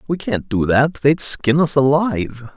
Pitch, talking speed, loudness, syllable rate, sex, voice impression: 140 Hz, 190 wpm, -17 LUFS, 4.3 syllables/s, male, very masculine, very adult-like, very thick, slightly tensed, powerful, slightly dark, very soft, muffled, fluent, raspy, cool, intellectual, very refreshing, sincere, very calm, very mature, friendly, reassuring, very unique, slightly elegant, very wild, sweet, lively, kind, slightly modest